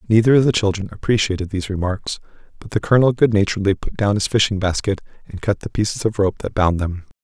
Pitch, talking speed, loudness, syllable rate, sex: 100 Hz, 215 wpm, -19 LUFS, 6.6 syllables/s, male